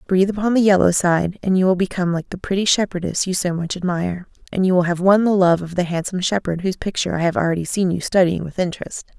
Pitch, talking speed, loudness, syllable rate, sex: 185 Hz, 250 wpm, -19 LUFS, 6.8 syllables/s, female